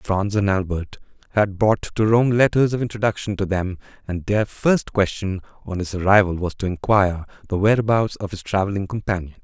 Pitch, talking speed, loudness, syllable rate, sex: 100 Hz, 180 wpm, -21 LUFS, 5.4 syllables/s, male